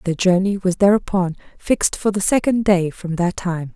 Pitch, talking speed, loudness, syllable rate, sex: 190 Hz, 190 wpm, -18 LUFS, 5.0 syllables/s, female